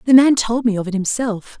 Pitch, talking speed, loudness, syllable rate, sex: 225 Hz, 265 wpm, -17 LUFS, 5.5 syllables/s, female